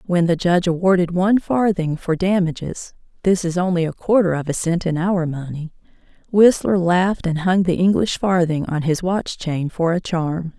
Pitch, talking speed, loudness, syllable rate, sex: 175 Hz, 185 wpm, -19 LUFS, 3.8 syllables/s, female